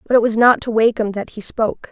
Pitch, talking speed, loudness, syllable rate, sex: 225 Hz, 280 wpm, -17 LUFS, 6.5 syllables/s, female